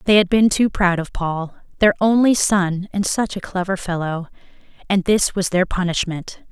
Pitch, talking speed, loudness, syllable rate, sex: 190 Hz, 185 wpm, -19 LUFS, 4.6 syllables/s, female